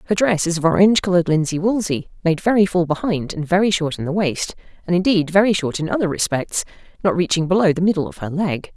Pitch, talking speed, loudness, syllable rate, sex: 180 Hz, 220 wpm, -19 LUFS, 6.3 syllables/s, female